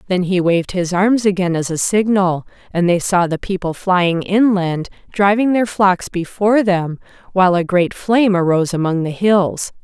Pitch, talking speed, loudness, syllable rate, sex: 185 Hz, 175 wpm, -16 LUFS, 4.8 syllables/s, female